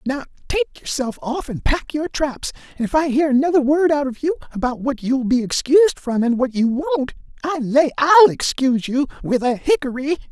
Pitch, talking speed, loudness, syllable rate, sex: 260 Hz, 200 wpm, -19 LUFS, 5.2 syllables/s, male